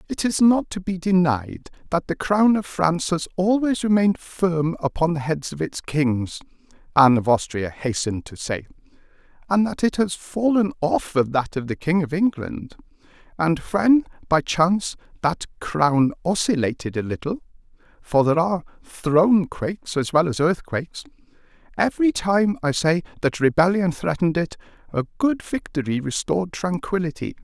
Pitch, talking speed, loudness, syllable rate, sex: 170 Hz, 150 wpm, -22 LUFS, 4.9 syllables/s, male